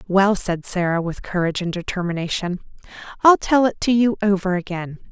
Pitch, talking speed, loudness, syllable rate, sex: 190 Hz, 165 wpm, -20 LUFS, 5.5 syllables/s, female